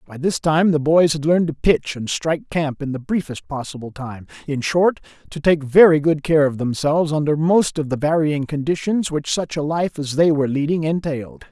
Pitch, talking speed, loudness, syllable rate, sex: 150 Hz, 210 wpm, -19 LUFS, 5.2 syllables/s, male